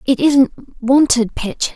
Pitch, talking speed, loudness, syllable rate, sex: 255 Hz, 135 wpm, -15 LUFS, 3.8 syllables/s, female